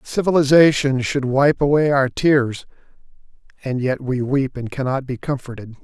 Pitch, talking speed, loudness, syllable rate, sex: 135 Hz, 145 wpm, -18 LUFS, 4.7 syllables/s, male